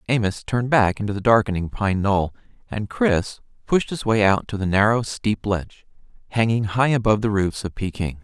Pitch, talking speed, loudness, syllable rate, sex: 105 Hz, 190 wpm, -21 LUFS, 5.3 syllables/s, male